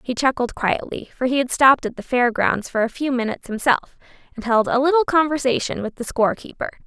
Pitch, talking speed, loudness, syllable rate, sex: 250 Hz, 220 wpm, -20 LUFS, 6.0 syllables/s, female